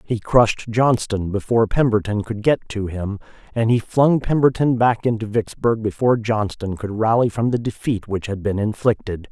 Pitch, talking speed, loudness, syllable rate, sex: 110 Hz, 175 wpm, -20 LUFS, 5.1 syllables/s, male